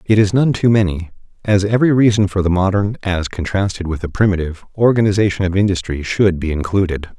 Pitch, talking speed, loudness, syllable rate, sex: 95 Hz, 185 wpm, -16 LUFS, 6.2 syllables/s, male